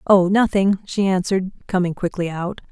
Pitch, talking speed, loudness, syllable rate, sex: 190 Hz, 155 wpm, -20 LUFS, 5.4 syllables/s, female